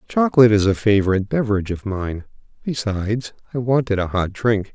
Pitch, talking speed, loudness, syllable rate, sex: 110 Hz, 165 wpm, -19 LUFS, 6.3 syllables/s, male